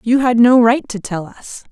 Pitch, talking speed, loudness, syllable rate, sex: 235 Hz, 245 wpm, -14 LUFS, 4.5 syllables/s, female